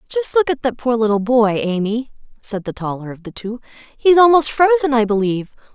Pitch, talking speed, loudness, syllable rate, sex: 240 Hz, 210 wpm, -17 LUFS, 5.6 syllables/s, female